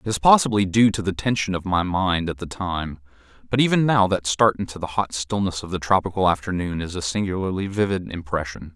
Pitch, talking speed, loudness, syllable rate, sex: 95 Hz, 210 wpm, -22 LUFS, 5.7 syllables/s, male